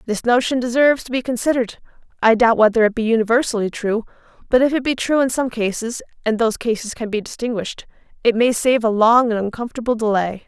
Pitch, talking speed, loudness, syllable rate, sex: 230 Hz, 200 wpm, -18 LUFS, 6.4 syllables/s, female